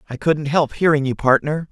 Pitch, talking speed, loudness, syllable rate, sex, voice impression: 150 Hz, 210 wpm, -18 LUFS, 5.3 syllables/s, male, masculine, adult-like, tensed, powerful, bright, clear, fluent, cool, intellectual, friendly, reassuring, wild, lively